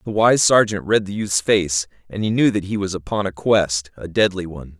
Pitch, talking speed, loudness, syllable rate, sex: 100 Hz, 240 wpm, -19 LUFS, 5.2 syllables/s, male